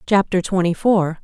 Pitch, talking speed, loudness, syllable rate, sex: 185 Hz, 145 wpm, -18 LUFS, 4.7 syllables/s, female